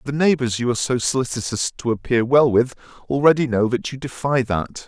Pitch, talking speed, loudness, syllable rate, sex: 125 Hz, 195 wpm, -20 LUFS, 5.7 syllables/s, male